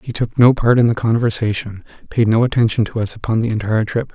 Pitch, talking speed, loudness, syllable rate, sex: 110 Hz, 230 wpm, -17 LUFS, 6.3 syllables/s, male